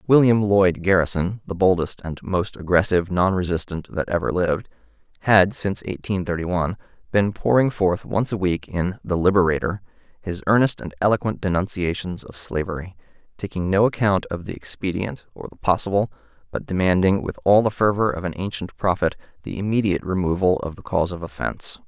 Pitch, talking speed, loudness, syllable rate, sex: 95 Hz, 165 wpm, -22 LUFS, 5.7 syllables/s, male